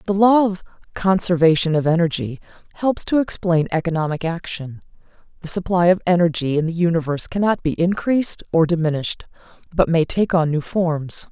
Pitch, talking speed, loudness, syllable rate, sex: 170 Hz, 155 wpm, -19 LUFS, 5.6 syllables/s, female